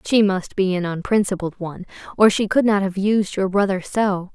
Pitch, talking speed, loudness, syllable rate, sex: 195 Hz, 205 wpm, -20 LUFS, 5.1 syllables/s, female